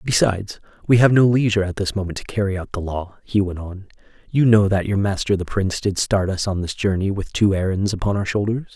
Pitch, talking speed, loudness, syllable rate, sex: 100 Hz, 240 wpm, -20 LUFS, 6.0 syllables/s, male